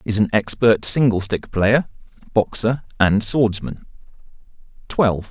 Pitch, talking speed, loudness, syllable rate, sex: 110 Hz, 100 wpm, -19 LUFS, 4.2 syllables/s, male